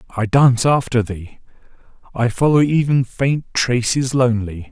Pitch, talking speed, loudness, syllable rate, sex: 120 Hz, 125 wpm, -17 LUFS, 4.6 syllables/s, male